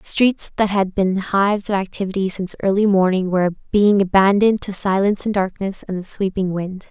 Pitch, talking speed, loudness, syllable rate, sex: 195 Hz, 185 wpm, -18 LUFS, 5.6 syllables/s, female